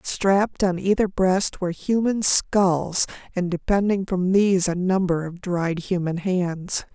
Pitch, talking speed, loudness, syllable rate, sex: 185 Hz, 145 wpm, -22 LUFS, 4.0 syllables/s, female